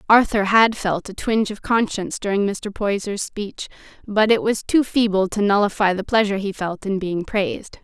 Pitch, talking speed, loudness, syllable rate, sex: 205 Hz, 190 wpm, -20 LUFS, 5.1 syllables/s, female